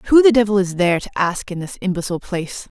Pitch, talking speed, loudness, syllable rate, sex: 195 Hz, 235 wpm, -18 LUFS, 7.0 syllables/s, female